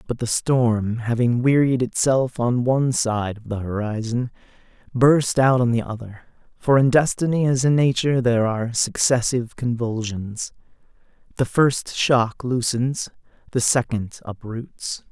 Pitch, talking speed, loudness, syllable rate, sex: 120 Hz, 135 wpm, -21 LUFS, 4.3 syllables/s, male